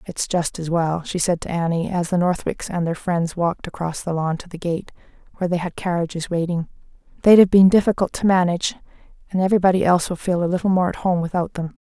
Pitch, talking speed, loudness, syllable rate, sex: 175 Hz, 225 wpm, -20 LUFS, 6.3 syllables/s, female